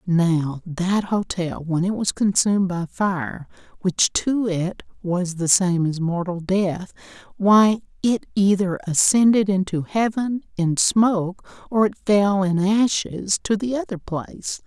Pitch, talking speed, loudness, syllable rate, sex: 190 Hz, 140 wpm, -21 LUFS, 3.8 syllables/s, female